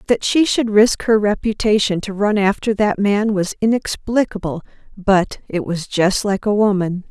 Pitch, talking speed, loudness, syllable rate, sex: 205 Hz, 170 wpm, -17 LUFS, 4.5 syllables/s, female